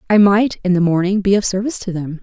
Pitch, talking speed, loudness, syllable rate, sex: 195 Hz, 270 wpm, -16 LUFS, 6.5 syllables/s, female